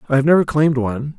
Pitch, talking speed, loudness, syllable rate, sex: 140 Hz, 255 wpm, -16 LUFS, 7.9 syllables/s, male